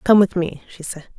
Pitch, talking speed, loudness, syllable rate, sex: 180 Hz, 255 wpm, -20 LUFS, 5.5 syllables/s, female